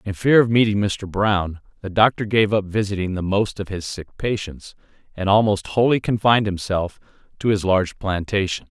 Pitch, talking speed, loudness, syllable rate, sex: 100 Hz, 175 wpm, -20 LUFS, 5.1 syllables/s, male